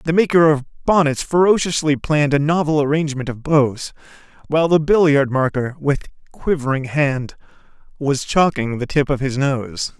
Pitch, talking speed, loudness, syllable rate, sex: 145 Hz, 150 wpm, -18 LUFS, 5.0 syllables/s, male